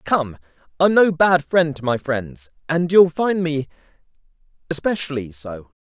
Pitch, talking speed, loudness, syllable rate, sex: 150 Hz, 135 wpm, -19 LUFS, 4.2 syllables/s, male